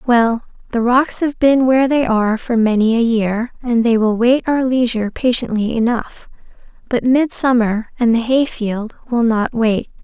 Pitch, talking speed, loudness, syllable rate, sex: 235 Hz, 175 wpm, -16 LUFS, 4.5 syllables/s, female